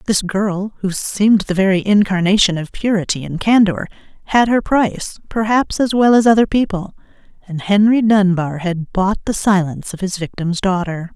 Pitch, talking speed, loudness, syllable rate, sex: 195 Hz, 165 wpm, -16 LUFS, 5.0 syllables/s, female